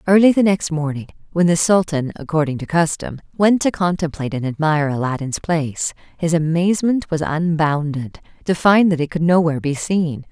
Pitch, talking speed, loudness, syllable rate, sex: 165 Hz, 170 wpm, -18 LUFS, 5.4 syllables/s, female